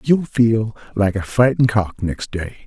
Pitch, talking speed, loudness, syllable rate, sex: 110 Hz, 180 wpm, -19 LUFS, 4.0 syllables/s, male